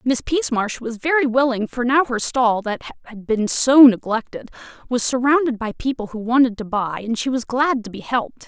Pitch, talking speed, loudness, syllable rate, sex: 245 Hz, 205 wpm, -19 LUFS, 5.1 syllables/s, female